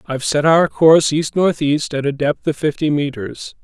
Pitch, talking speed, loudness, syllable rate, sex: 150 Hz, 200 wpm, -16 LUFS, 4.9 syllables/s, male